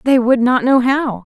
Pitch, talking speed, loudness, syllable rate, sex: 245 Hz, 225 wpm, -14 LUFS, 4.4 syllables/s, female